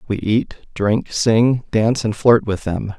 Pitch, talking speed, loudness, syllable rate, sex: 110 Hz, 180 wpm, -17 LUFS, 3.8 syllables/s, male